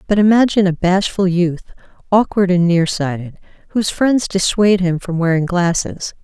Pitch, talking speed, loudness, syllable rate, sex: 185 Hz, 155 wpm, -16 LUFS, 5.2 syllables/s, female